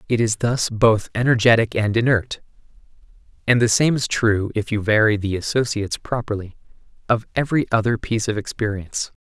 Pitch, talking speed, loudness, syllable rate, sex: 110 Hz, 155 wpm, -20 LUFS, 4.4 syllables/s, male